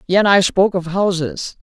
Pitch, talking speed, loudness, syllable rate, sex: 185 Hz, 180 wpm, -16 LUFS, 4.9 syllables/s, female